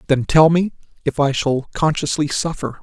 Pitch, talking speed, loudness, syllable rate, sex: 145 Hz, 170 wpm, -18 LUFS, 4.9 syllables/s, male